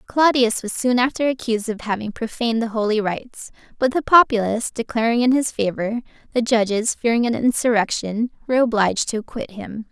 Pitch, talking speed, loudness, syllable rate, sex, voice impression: 230 Hz, 170 wpm, -20 LUFS, 5.8 syllables/s, female, very feminine, young, slightly adult-like, very thin, tensed, slightly powerful, very bright, hard, very clear, very fluent, slightly raspy, very cute, slightly cool, intellectual, very refreshing, sincere, slightly calm, very friendly, very reassuring, very unique, very elegant, slightly wild, sweet, very lively, strict, intense, slightly sharp, very light